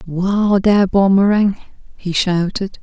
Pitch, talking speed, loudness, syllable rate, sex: 190 Hz, 105 wpm, -15 LUFS, 3.4 syllables/s, female